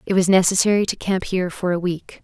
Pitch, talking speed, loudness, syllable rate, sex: 185 Hz, 240 wpm, -19 LUFS, 6.3 syllables/s, female